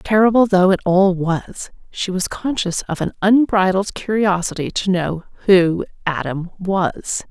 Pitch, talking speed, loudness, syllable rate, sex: 190 Hz, 140 wpm, -18 LUFS, 4.0 syllables/s, female